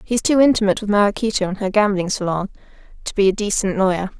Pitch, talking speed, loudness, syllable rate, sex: 200 Hz, 200 wpm, -18 LUFS, 6.9 syllables/s, female